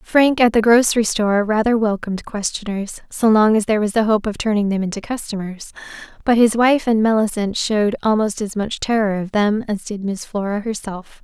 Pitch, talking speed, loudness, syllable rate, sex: 215 Hz, 190 wpm, -18 LUFS, 5.4 syllables/s, female